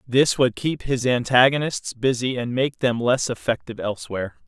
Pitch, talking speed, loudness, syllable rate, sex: 125 Hz, 160 wpm, -22 LUFS, 5.2 syllables/s, male